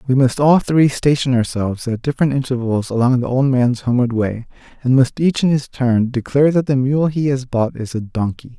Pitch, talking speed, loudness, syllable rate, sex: 130 Hz, 215 wpm, -17 LUFS, 5.5 syllables/s, male